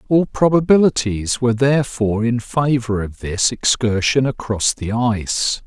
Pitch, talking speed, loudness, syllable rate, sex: 120 Hz, 125 wpm, -18 LUFS, 4.6 syllables/s, male